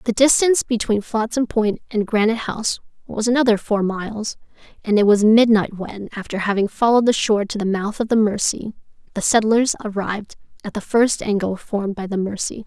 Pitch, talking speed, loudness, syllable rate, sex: 215 Hz, 185 wpm, -19 LUFS, 5.7 syllables/s, female